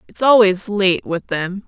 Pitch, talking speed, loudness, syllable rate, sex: 200 Hz, 180 wpm, -16 LUFS, 4.0 syllables/s, female